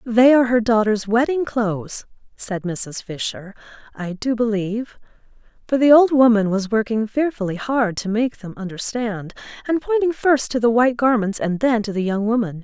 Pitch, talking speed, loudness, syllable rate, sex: 225 Hz, 175 wpm, -19 LUFS, 5.0 syllables/s, female